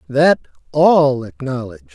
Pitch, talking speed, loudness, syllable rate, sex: 145 Hz, 90 wpm, -16 LUFS, 4.2 syllables/s, male